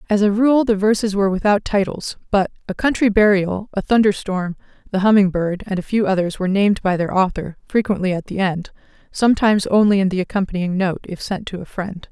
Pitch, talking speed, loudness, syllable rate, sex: 200 Hz, 205 wpm, -18 LUFS, 5.9 syllables/s, female